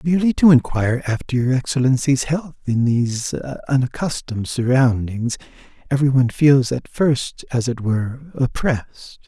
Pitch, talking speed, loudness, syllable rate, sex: 130 Hz, 130 wpm, -19 LUFS, 5.2 syllables/s, male